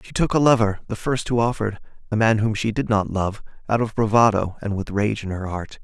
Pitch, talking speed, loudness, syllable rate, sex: 105 Hz, 245 wpm, -21 LUFS, 5.8 syllables/s, male